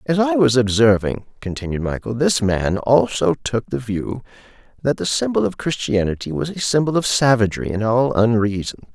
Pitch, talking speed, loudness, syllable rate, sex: 120 Hz, 170 wpm, -19 LUFS, 5.1 syllables/s, male